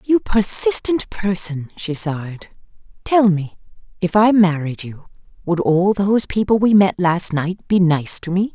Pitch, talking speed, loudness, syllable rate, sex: 185 Hz, 160 wpm, -17 LUFS, 4.3 syllables/s, female